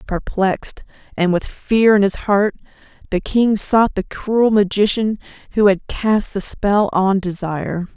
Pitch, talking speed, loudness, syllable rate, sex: 200 Hz, 150 wpm, -17 LUFS, 4.0 syllables/s, female